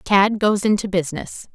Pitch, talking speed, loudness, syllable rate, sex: 200 Hz, 155 wpm, -19 LUFS, 4.9 syllables/s, female